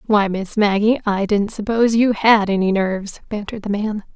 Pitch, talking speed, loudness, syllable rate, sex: 210 Hz, 190 wpm, -18 LUFS, 5.3 syllables/s, female